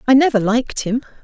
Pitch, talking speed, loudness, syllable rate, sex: 240 Hz, 195 wpm, -17 LUFS, 6.8 syllables/s, female